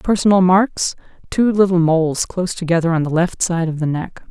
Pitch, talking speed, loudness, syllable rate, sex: 175 Hz, 180 wpm, -17 LUFS, 5.5 syllables/s, female